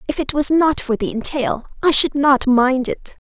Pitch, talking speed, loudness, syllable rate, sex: 270 Hz, 220 wpm, -16 LUFS, 4.6 syllables/s, female